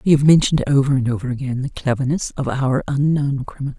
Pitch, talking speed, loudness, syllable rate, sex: 135 Hz, 205 wpm, -19 LUFS, 6.4 syllables/s, female